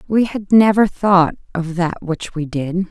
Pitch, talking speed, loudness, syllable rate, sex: 180 Hz, 185 wpm, -17 LUFS, 3.9 syllables/s, female